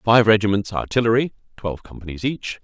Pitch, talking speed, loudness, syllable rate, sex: 105 Hz, 135 wpm, -20 LUFS, 6.0 syllables/s, male